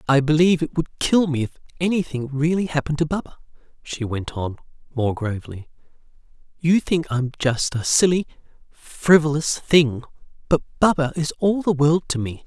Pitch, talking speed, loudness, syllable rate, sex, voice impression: 150 Hz, 155 wpm, -21 LUFS, 5.1 syllables/s, male, masculine, adult-like, slightly thick, slightly dark, very calm